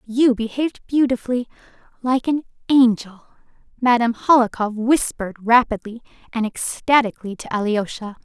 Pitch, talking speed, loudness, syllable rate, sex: 235 Hz, 100 wpm, -19 LUFS, 5.4 syllables/s, female